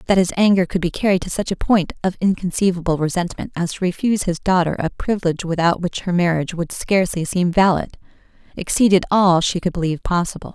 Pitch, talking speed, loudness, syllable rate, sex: 180 Hz, 195 wpm, -19 LUFS, 6.4 syllables/s, female